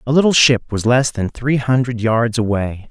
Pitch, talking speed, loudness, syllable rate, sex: 120 Hz, 205 wpm, -16 LUFS, 4.7 syllables/s, male